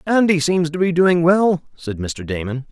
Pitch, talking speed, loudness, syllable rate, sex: 160 Hz, 200 wpm, -18 LUFS, 4.4 syllables/s, male